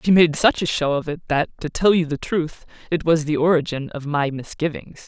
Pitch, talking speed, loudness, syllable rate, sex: 160 Hz, 235 wpm, -21 LUFS, 5.3 syllables/s, female